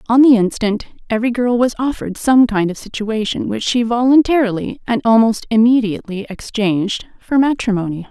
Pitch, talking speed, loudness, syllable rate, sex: 225 Hz, 150 wpm, -16 LUFS, 5.5 syllables/s, female